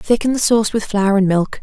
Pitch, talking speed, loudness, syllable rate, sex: 210 Hz, 260 wpm, -16 LUFS, 5.7 syllables/s, female